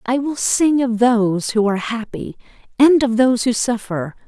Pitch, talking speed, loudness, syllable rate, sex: 235 Hz, 180 wpm, -17 LUFS, 4.9 syllables/s, female